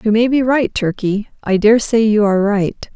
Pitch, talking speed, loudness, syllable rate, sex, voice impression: 215 Hz, 205 wpm, -15 LUFS, 4.8 syllables/s, female, feminine, adult-like, slightly soft, calm, sweet